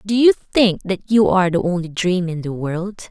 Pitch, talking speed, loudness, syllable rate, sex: 190 Hz, 230 wpm, -18 LUFS, 5.1 syllables/s, female